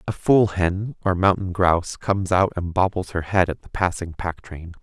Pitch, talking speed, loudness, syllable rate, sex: 90 Hz, 200 wpm, -22 LUFS, 4.9 syllables/s, male